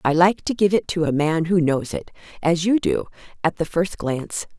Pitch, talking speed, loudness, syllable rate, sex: 165 Hz, 235 wpm, -21 LUFS, 5.1 syllables/s, female